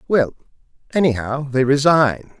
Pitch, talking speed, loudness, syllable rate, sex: 135 Hz, 100 wpm, -18 LUFS, 4.4 syllables/s, male